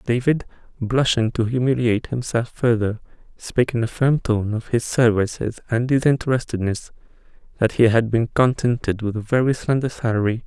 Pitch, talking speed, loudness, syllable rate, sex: 120 Hz, 145 wpm, -21 LUFS, 5.3 syllables/s, male